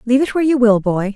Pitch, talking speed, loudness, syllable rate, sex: 240 Hz, 310 wpm, -15 LUFS, 7.6 syllables/s, female